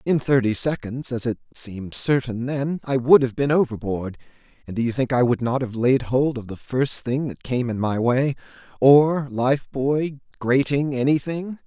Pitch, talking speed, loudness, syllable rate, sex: 130 Hz, 180 wpm, -22 LUFS, 4.6 syllables/s, male